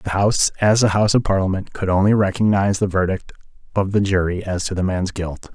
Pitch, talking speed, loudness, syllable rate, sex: 95 Hz, 215 wpm, -19 LUFS, 6.0 syllables/s, male